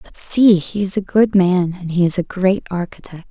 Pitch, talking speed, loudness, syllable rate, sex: 185 Hz, 235 wpm, -17 LUFS, 4.6 syllables/s, female